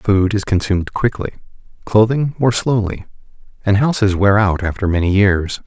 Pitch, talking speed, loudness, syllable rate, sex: 100 Hz, 150 wpm, -16 LUFS, 4.9 syllables/s, male